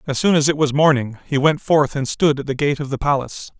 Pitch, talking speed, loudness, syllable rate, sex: 140 Hz, 285 wpm, -18 LUFS, 5.9 syllables/s, male